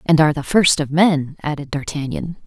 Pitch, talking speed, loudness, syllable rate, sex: 155 Hz, 195 wpm, -18 LUFS, 5.4 syllables/s, female